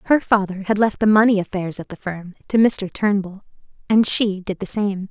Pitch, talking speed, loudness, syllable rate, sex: 200 Hz, 210 wpm, -19 LUFS, 5.1 syllables/s, female